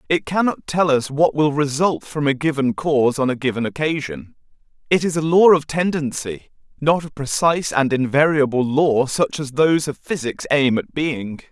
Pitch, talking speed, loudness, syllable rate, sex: 145 Hz, 180 wpm, -19 LUFS, 4.9 syllables/s, male